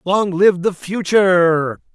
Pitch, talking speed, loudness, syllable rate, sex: 180 Hz, 125 wpm, -16 LUFS, 3.5 syllables/s, male